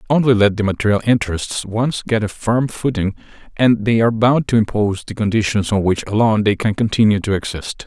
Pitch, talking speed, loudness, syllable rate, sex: 110 Hz, 200 wpm, -17 LUFS, 5.9 syllables/s, male